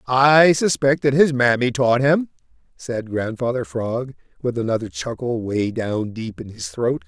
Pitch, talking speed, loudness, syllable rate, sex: 125 Hz, 160 wpm, -20 LUFS, 4.2 syllables/s, male